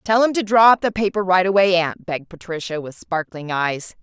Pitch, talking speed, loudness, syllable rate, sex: 185 Hz, 225 wpm, -19 LUFS, 5.4 syllables/s, female